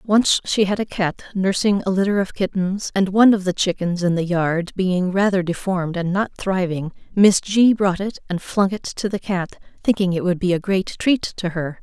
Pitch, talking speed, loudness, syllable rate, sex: 190 Hz, 220 wpm, -20 LUFS, 4.9 syllables/s, female